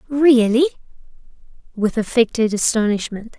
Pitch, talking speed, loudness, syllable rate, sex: 235 Hz, 70 wpm, -17 LUFS, 4.7 syllables/s, female